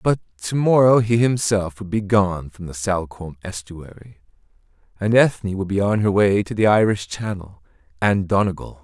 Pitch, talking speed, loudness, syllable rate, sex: 100 Hz, 170 wpm, -19 LUFS, 4.9 syllables/s, male